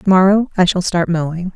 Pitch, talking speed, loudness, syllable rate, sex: 180 Hz, 195 wpm, -15 LUFS, 5.6 syllables/s, female